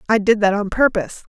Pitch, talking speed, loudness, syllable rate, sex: 210 Hz, 225 wpm, -17 LUFS, 6.4 syllables/s, female